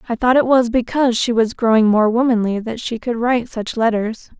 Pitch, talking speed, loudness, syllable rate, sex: 235 Hz, 220 wpm, -17 LUFS, 5.5 syllables/s, female